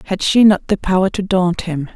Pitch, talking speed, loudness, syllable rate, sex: 185 Hz, 245 wpm, -15 LUFS, 5.2 syllables/s, female